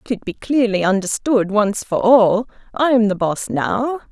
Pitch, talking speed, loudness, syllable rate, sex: 220 Hz, 160 wpm, -17 LUFS, 4.1 syllables/s, female